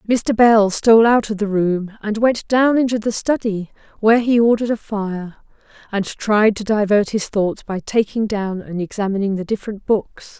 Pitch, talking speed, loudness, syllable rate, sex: 210 Hz, 185 wpm, -18 LUFS, 4.8 syllables/s, female